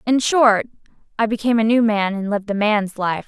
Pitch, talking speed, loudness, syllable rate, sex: 215 Hz, 220 wpm, -18 LUFS, 5.7 syllables/s, female